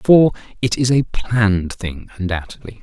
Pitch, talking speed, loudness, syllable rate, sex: 110 Hz, 150 wpm, -18 LUFS, 4.7 syllables/s, male